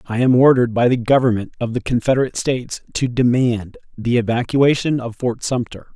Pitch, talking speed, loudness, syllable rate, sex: 120 Hz, 170 wpm, -18 LUFS, 5.7 syllables/s, male